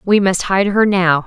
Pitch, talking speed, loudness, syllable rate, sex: 190 Hz, 240 wpm, -14 LUFS, 4.4 syllables/s, female